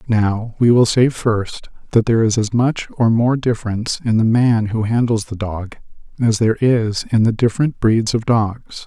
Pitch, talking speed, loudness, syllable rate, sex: 115 Hz, 195 wpm, -17 LUFS, 4.7 syllables/s, male